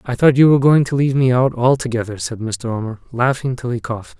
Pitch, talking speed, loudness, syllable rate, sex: 125 Hz, 245 wpm, -17 LUFS, 6.3 syllables/s, male